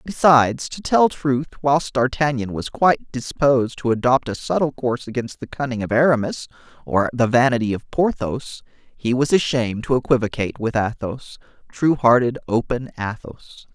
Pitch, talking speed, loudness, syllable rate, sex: 125 Hz, 155 wpm, -20 LUFS, 5.1 syllables/s, male